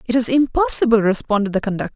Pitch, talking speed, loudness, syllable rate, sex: 230 Hz, 185 wpm, -18 LUFS, 6.9 syllables/s, female